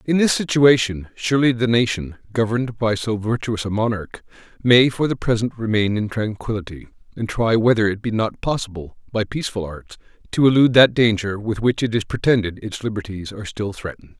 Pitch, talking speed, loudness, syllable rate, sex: 110 Hz, 180 wpm, -20 LUFS, 5.7 syllables/s, male